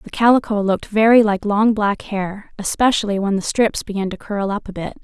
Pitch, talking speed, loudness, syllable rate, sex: 205 Hz, 215 wpm, -18 LUFS, 5.4 syllables/s, female